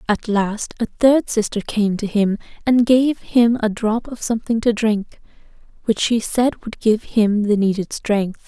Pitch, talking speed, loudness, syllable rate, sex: 220 Hz, 185 wpm, -19 LUFS, 4.2 syllables/s, female